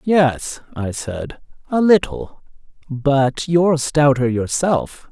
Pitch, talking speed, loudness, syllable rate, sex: 145 Hz, 105 wpm, -18 LUFS, 3.2 syllables/s, male